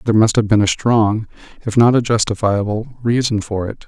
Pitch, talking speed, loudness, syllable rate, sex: 110 Hz, 200 wpm, -16 LUFS, 5.4 syllables/s, male